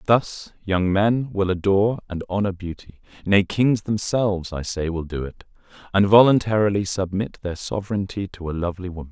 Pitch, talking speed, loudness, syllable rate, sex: 95 Hz, 165 wpm, -22 LUFS, 5.3 syllables/s, male